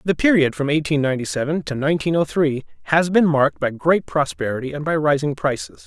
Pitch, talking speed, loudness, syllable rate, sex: 145 Hz, 205 wpm, -20 LUFS, 6.0 syllables/s, male